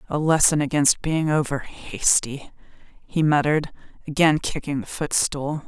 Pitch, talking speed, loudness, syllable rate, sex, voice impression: 150 Hz, 125 wpm, -21 LUFS, 4.4 syllables/s, female, feminine, adult-like, soft, slightly muffled, calm, friendly, reassuring, slightly elegant, slightly sweet